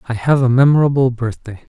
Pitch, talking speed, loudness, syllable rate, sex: 125 Hz, 170 wpm, -14 LUFS, 6.0 syllables/s, male